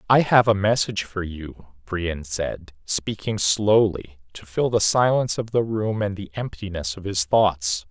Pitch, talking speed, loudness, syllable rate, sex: 100 Hz, 175 wpm, -22 LUFS, 4.3 syllables/s, male